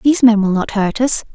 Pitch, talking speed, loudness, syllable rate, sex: 225 Hz, 270 wpm, -15 LUFS, 5.9 syllables/s, female